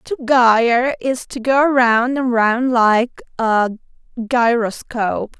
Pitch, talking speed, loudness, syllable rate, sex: 240 Hz, 120 wpm, -16 LUFS, 3.4 syllables/s, female